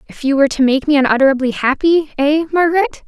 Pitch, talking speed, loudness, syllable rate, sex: 285 Hz, 195 wpm, -14 LUFS, 6.9 syllables/s, female